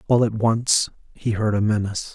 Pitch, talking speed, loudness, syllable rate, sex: 110 Hz, 195 wpm, -21 LUFS, 5.1 syllables/s, male